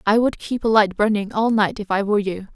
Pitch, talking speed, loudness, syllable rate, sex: 210 Hz, 280 wpm, -20 LUFS, 5.9 syllables/s, female